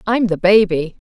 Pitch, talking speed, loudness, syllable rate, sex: 195 Hz, 165 wpm, -15 LUFS, 4.7 syllables/s, female